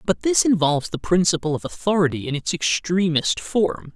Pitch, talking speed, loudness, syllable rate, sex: 175 Hz, 165 wpm, -21 LUFS, 5.2 syllables/s, male